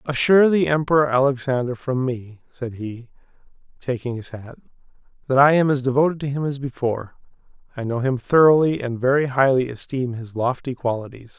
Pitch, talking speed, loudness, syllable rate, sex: 130 Hz, 165 wpm, -20 LUFS, 5.6 syllables/s, male